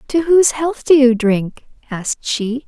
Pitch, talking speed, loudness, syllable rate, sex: 265 Hz, 180 wpm, -15 LUFS, 4.5 syllables/s, female